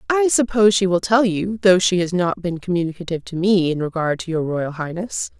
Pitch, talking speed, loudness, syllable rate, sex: 185 Hz, 225 wpm, -19 LUFS, 5.7 syllables/s, female